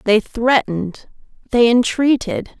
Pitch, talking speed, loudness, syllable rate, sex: 235 Hz, 90 wpm, -16 LUFS, 4.0 syllables/s, female